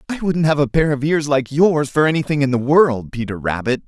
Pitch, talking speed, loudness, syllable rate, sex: 140 Hz, 250 wpm, -17 LUFS, 5.5 syllables/s, male